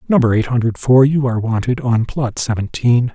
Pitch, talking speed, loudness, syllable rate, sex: 120 Hz, 190 wpm, -16 LUFS, 5.4 syllables/s, male